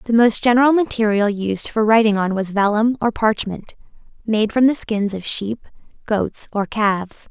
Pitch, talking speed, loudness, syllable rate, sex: 215 Hz, 175 wpm, -18 LUFS, 4.7 syllables/s, female